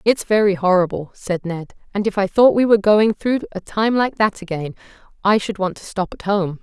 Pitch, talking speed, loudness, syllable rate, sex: 200 Hz, 225 wpm, -18 LUFS, 5.2 syllables/s, female